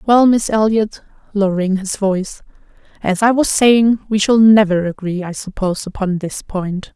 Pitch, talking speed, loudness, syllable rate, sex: 205 Hz, 165 wpm, -16 LUFS, 4.3 syllables/s, female